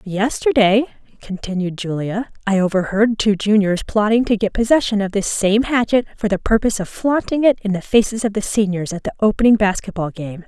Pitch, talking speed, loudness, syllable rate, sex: 210 Hz, 185 wpm, -18 LUFS, 5.5 syllables/s, female